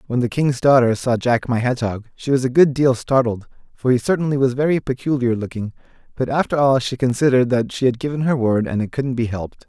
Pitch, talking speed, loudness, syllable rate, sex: 125 Hz, 230 wpm, -19 LUFS, 6.0 syllables/s, male